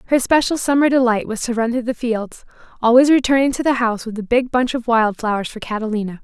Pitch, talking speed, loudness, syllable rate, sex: 240 Hz, 230 wpm, -18 LUFS, 6.2 syllables/s, female